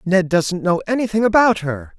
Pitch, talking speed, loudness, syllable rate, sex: 190 Hz, 180 wpm, -17 LUFS, 5.0 syllables/s, male